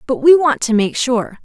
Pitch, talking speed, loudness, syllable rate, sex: 250 Hz, 250 wpm, -14 LUFS, 4.7 syllables/s, female